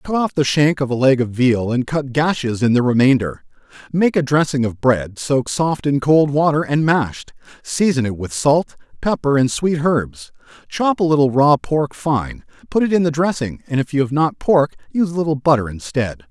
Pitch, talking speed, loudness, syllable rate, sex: 140 Hz, 210 wpm, -17 LUFS, 5.0 syllables/s, male